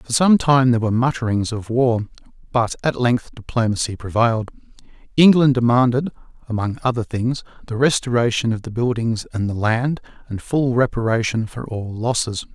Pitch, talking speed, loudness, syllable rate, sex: 120 Hz, 155 wpm, -19 LUFS, 5.2 syllables/s, male